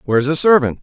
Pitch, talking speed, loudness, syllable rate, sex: 145 Hz, 220 wpm, -14 LUFS, 7.0 syllables/s, male